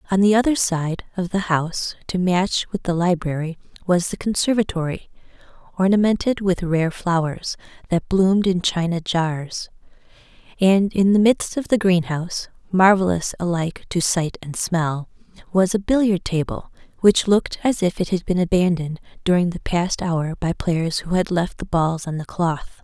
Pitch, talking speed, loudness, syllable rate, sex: 180 Hz, 165 wpm, -20 LUFS, 4.8 syllables/s, female